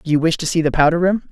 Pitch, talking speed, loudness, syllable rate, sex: 165 Hz, 365 wpm, -17 LUFS, 7.3 syllables/s, male